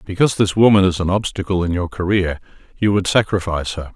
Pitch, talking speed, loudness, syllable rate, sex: 95 Hz, 195 wpm, -18 LUFS, 6.3 syllables/s, male